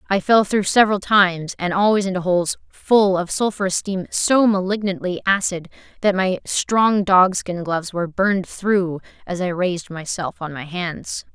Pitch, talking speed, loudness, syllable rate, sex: 185 Hz, 165 wpm, -19 LUFS, 4.8 syllables/s, female